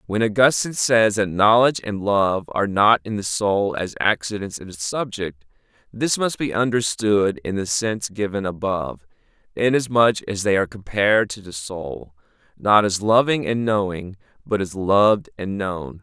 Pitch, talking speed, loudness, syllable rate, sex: 100 Hz, 165 wpm, -20 LUFS, 4.8 syllables/s, male